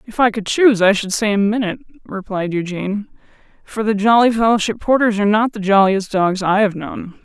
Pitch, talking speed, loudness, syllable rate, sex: 210 Hz, 200 wpm, -16 LUFS, 5.8 syllables/s, female